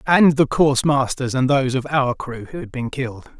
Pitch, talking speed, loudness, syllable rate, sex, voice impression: 135 Hz, 230 wpm, -19 LUFS, 5.4 syllables/s, male, masculine, adult-like, tensed, powerful, hard, clear, cool, intellectual, slightly mature, wild, lively, strict, slightly intense